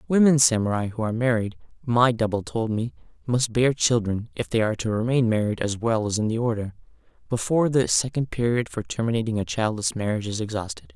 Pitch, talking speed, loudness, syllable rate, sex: 115 Hz, 180 wpm, -24 LUFS, 6.0 syllables/s, male